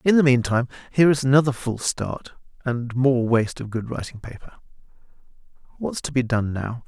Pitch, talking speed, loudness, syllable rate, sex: 125 Hz, 175 wpm, -22 LUFS, 5.8 syllables/s, male